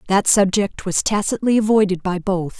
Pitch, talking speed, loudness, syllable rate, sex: 195 Hz, 160 wpm, -18 LUFS, 5.0 syllables/s, female